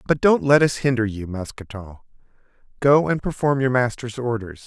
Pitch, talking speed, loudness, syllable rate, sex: 120 Hz, 165 wpm, -20 LUFS, 5.2 syllables/s, male